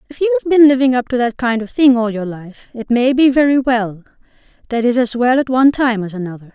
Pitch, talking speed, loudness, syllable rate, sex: 245 Hz, 255 wpm, -14 LUFS, 6.0 syllables/s, female